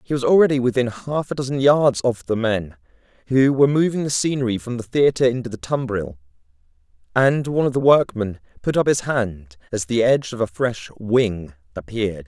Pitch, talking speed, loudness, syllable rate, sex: 120 Hz, 190 wpm, -20 LUFS, 5.4 syllables/s, male